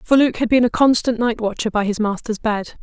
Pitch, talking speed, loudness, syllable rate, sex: 225 Hz, 255 wpm, -18 LUFS, 5.6 syllables/s, female